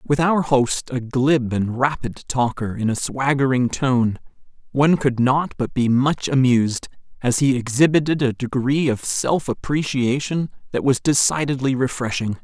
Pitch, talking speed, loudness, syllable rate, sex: 130 Hz, 150 wpm, -20 LUFS, 4.4 syllables/s, male